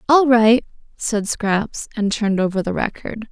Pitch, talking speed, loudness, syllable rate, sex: 220 Hz, 165 wpm, -18 LUFS, 4.4 syllables/s, female